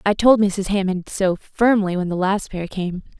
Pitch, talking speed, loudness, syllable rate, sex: 195 Hz, 205 wpm, -20 LUFS, 4.6 syllables/s, female